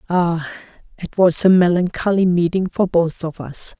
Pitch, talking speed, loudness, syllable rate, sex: 175 Hz, 160 wpm, -17 LUFS, 4.6 syllables/s, female